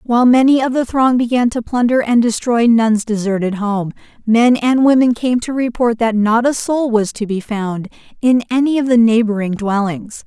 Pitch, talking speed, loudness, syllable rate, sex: 235 Hz, 195 wpm, -15 LUFS, 4.9 syllables/s, female